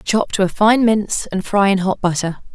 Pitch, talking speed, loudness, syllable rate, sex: 200 Hz, 235 wpm, -17 LUFS, 5.0 syllables/s, female